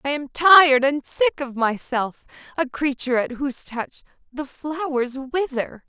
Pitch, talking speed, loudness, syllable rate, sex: 275 Hz, 145 wpm, -21 LUFS, 4.3 syllables/s, female